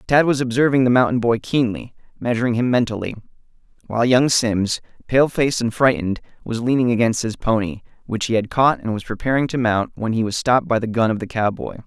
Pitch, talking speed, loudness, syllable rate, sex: 120 Hz, 205 wpm, -19 LUFS, 6.0 syllables/s, male